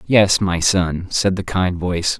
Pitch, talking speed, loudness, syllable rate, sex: 90 Hz, 190 wpm, -18 LUFS, 4.0 syllables/s, male